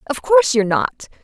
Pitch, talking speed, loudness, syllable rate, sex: 270 Hz, 195 wpm, -16 LUFS, 6.1 syllables/s, female